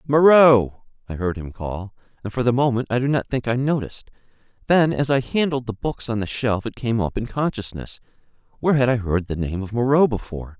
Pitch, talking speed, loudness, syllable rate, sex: 120 Hz, 215 wpm, -21 LUFS, 5.7 syllables/s, male